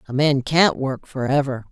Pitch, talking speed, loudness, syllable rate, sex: 140 Hz, 210 wpm, -20 LUFS, 4.6 syllables/s, female